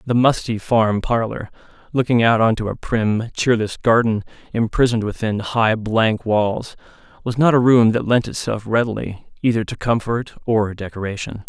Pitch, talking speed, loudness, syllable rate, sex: 115 Hz, 155 wpm, -19 LUFS, 4.7 syllables/s, male